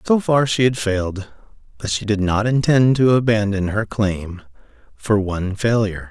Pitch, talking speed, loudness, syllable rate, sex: 105 Hz, 165 wpm, -18 LUFS, 4.8 syllables/s, male